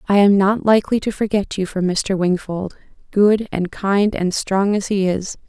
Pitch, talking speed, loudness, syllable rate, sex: 195 Hz, 195 wpm, -18 LUFS, 4.5 syllables/s, female